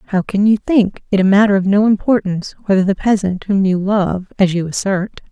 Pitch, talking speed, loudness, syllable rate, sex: 195 Hz, 215 wpm, -15 LUFS, 5.6 syllables/s, female